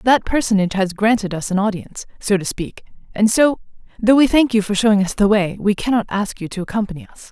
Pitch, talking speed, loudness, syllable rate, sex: 210 Hz, 230 wpm, -17 LUFS, 6.1 syllables/s, female